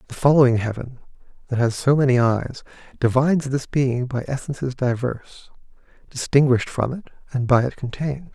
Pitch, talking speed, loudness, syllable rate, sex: 130 Hz, 150 wpm, -21 LUFS, 5.6 syllables/s, male